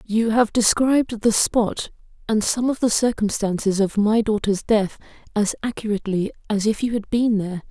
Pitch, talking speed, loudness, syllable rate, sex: 215 Hz, 170 wpm, -21 LUFS, 5.0 syllables/s, female